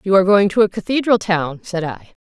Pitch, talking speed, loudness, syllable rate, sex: 195 Hz, 240 wpm, -17 LUFS, 5.9 syllables/s, female